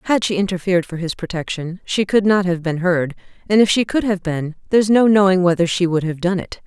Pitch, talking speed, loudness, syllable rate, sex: 185 Hz, 245 wpm, -18 LUFS, 5.9 syllables/s, female